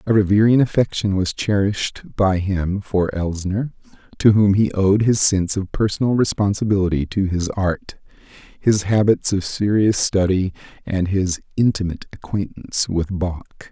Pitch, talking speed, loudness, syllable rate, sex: 100 Hz, 140 wpm, -19 LUFS, 4.8 syllables/s, male